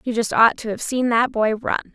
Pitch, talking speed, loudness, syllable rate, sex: 230 Hz, 275 wpm, -19 LUFS, 5.3 syllables/s, female